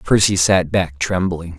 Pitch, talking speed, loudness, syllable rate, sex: 90 Hz, 150 wpm, -17 LUFS, 4.0 syllables/s, male